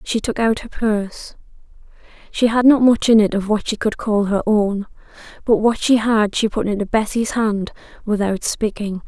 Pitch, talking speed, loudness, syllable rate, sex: 215 Hz, 190 wpm, -18 LUFS, 4.8 syllables/s, female